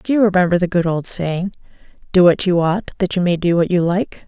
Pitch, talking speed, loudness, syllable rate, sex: 180 Hz, 255 wpm, -17 LUFS, 5.6 syllables/s, female